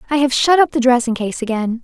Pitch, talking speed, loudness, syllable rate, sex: 255 Hz, 260 wpm, -16 LUFS, 6.2 syllables/s, female